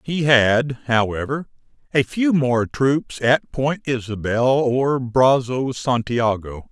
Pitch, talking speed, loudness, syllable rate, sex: 125 Hz, 115 wpm, -19 LUFS, 3.4 syllables/s, male